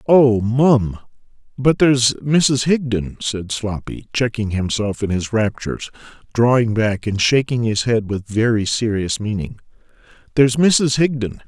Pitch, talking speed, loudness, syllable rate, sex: 115 Hz, 130 wpm, -18 LUFS, 4.3 syllables/s, male